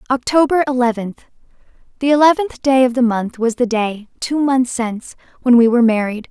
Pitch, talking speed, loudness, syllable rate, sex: 250 Hz, 160 wpm, -16 LUFS, 5.2 syllables/s, female